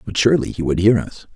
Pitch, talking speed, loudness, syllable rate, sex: 100 Hz, 265 wpm, -17 LUFS, 6.7 syllables/s, male